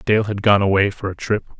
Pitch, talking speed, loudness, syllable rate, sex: 100 Hz, 265 wpm, -18 LUFS, 5.5 syllables/s, male